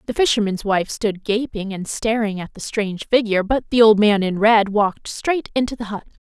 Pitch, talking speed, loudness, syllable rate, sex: 215 Hz, 210 wpm, -19 LUFS, 5.3 syllables/s, female